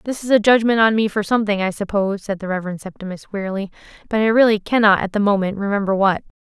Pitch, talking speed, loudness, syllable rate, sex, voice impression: 205 Hz, 225 wpm, -18 LUFS, 7.1 syllables/s, female, very feminine, slightly young, slightly adult-like, thin, tensed, powerful, bright, hard, clear, very fluent, cute, slightly intellectual, refreshing, slightly sincere, slightly calm, friendly, reassuring, unique, slightly elegant, wild, slightly sweet, lively, strict, intense, slightly sharp, slightly light